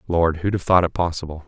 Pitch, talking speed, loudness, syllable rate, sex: 85 Hz, 205 wpm, -20 LUFS, 6.1 syllables/s, male